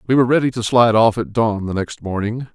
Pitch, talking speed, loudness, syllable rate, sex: 115 Hz, 260 wpm, -17 LUFS, 6.4 syllables/s, male